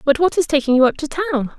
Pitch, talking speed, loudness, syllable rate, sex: 295 Hz, 305 wpm, -17 LUFS, 6.7 syllables/s, female